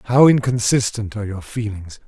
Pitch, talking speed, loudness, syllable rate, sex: 115 Hz, 145 wpm, -19 LUFS, 4.9 syllables/s, male